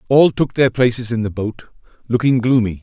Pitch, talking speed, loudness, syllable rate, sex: 120 Hz, 190 wpm, -17 LUFS, 5.6 syllables/s, male